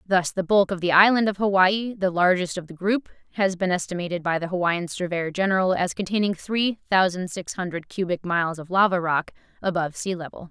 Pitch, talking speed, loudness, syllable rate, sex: 185 Hz, 195 wpm, -23 LUFS, 5.7 syllables/s, female